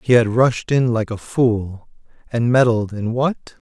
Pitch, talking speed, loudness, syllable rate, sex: 120 Hz, 175 wpm, -18 LUFS, 3.9 syllables/s, male